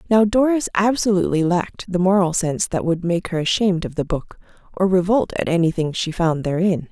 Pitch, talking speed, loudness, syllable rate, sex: 180 Hz, 190 wpm, -19 LUFS, 5.7 syllables/s, female